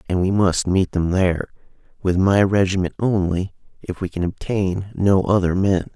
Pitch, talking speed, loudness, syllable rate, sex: 95 Hz, 170 wpm, -20 LUFS, 4.7 syllables/s, male